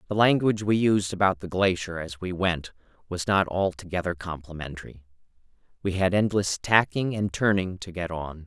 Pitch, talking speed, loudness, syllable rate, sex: 95 Hz, 165 wpm, -25 LUFS, 5.2 syllables/s, male